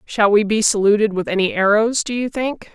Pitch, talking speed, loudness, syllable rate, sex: 215 Hz, 220 wpm, -17 LUFS, 5.3 syllables/s, female